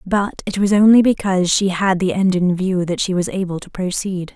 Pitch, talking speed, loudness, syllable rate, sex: 190 Hz, 235 wpm, -17 LUFS, 5.2 syllables/s, female